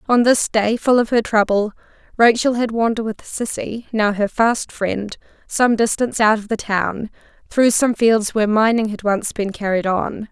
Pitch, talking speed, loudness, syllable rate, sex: 220 Hz, 185 wpm, -18 LUFS, 4.7 syllables/s, female